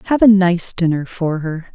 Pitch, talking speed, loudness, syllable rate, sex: 180 Hz, 205 wpm, -16 LUFS, 4.7 syllables/s, female